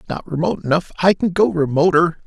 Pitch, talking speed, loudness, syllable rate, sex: 165 Hz, 210 wpm, -17 LUFS, 6.3 syllables/s, male